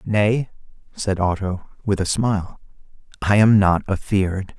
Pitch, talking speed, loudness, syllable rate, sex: 100 Hz, 130 wpm, -20 LUFS, 4.3 syllables/s, male